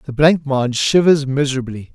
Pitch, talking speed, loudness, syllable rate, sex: 140 Hz, 125 wpm, -16 LUFS, 5.5 syllables/s, male